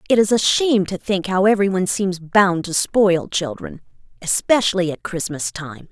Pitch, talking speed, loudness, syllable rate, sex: 185 Hz, 185 wpm, -18 LUFS, 5.1 syllables/s, female